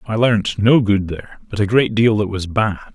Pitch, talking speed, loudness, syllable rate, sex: 105 Hz, 245 wpm, -17 LUFS, 5.1 syllables/s, male